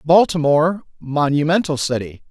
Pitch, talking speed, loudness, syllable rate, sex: 155 Hz, 80 wpm, -18 LUFS, 5.1 syllables/s, male